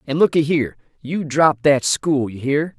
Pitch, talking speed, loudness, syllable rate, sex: 145 Hz, 195 wpm, -18 LUFS, 4.5 syllables/s, male